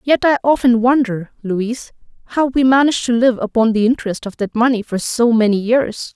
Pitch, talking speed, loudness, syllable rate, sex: 240 Hz, 195 wpm, -16 LUFS, 5.6 syllables/s, female